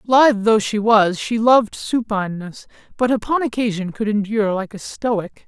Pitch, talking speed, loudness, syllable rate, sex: 220 Hz, 165 wpm, -18 LUFS, 4.9 syllables/s, male